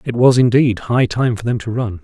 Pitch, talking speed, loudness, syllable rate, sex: 115 Hz, 265 wpm, -15 LUFS, 5.2 syllables/s, male